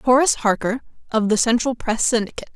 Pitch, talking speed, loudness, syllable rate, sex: 230 Hz, 165 wpm, -20 LUFS, 6.3 syllables/s, female